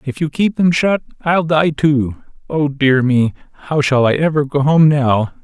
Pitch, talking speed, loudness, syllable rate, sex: 145 Hz, 200 wpm, -15 LUFS, 4.2 syllables/s, male